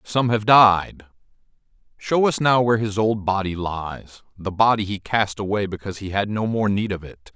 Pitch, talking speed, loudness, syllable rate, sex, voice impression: 105 Hz, 190 wpm, -20 LUFS, 4.8 syllables/s, male, very masculine, very middle-aged, thick, slightly tensed, weak, slightly bright, soft, muffled, fluent, slightly raspy, cool, very intellectual, slightly refreshing, sincere, calm, mature, very friendly, reassuring, unique, very elegant, wild, slightly sweet, lively, kind, slightly modest